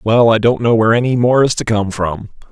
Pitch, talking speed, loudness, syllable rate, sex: 115 Hz, 260 wpm, -14 LUFS, 5.7 syllables/s, male